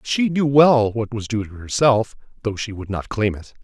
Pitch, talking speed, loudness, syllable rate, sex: 115 Hz, 230 wpm, -20 LUFS, 4.7 syllables/s, male